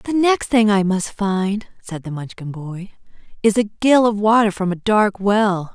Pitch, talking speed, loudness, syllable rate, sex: 205 Hz, 200 wpm, -18 LUFS, 4.3 syllables/s, female